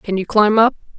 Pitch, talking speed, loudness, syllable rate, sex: 210 Hz, 245 wpm, -15 LUFS, 5.4 syllables/s, female